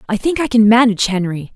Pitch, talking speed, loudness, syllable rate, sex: 220 Hz, 230 wpm, -14 LUFS, 6.6 syllables/s, female